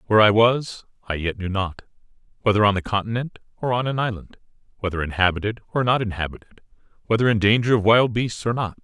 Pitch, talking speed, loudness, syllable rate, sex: 105 Hz, 190 wpm, -21 LUFS, 6.2 syllables/s, male